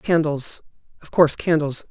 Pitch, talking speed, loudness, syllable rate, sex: 155 Hz, 125 wpm, -20 LUFS, 4.7 syllables/s, male